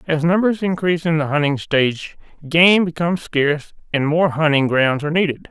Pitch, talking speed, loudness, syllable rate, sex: 160 Hz, 175 wpm, -17 LUFS, 5.5 syllables/s, male